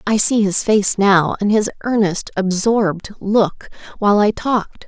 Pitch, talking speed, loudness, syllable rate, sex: 205 Hz, 160 wpm, -16 LUFS, 4.4 syllables/s, female